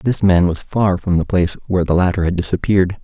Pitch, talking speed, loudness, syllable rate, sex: 90 Hz, 235 wpm, -17 LUFS, 6.3 syllables/s, male